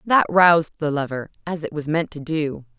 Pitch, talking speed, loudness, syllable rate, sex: 155 Hz, 215 wpm, -21 LUFS, 5.2 syllables/s, female